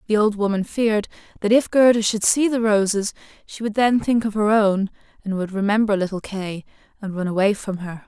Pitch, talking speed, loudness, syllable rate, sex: 210 Hz, 200 wpm, -20 LUFS, 5.3 syllables/s, female